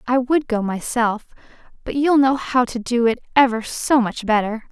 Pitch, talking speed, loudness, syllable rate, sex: 240 Hz, 190 wpm, -19 LUFS, 4.7 syllables/s, female